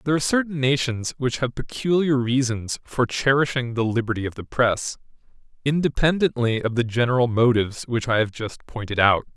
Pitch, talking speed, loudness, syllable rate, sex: 125 Hz, 165 wpm, -22 LUFS, 5.5 syllables/s, male